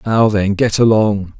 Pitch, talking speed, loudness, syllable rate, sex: 105 Hz, 175 wpm, -14 LUFS, 4.0 syllables/s, male